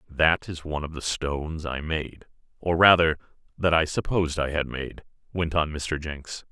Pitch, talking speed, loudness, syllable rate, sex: 80 Hz, 175 wpm, -25 LUFS, 4.8 syllables/s, male